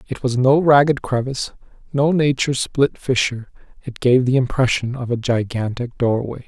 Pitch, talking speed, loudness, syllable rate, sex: 125 Hz, 160 wpm, -18 LUFS, 5.2 syllables/s, male